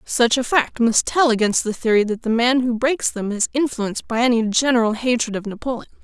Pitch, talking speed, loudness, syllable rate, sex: 235 Hz, 220 wpm, -19 LUFS, 5.5 syllables/s, female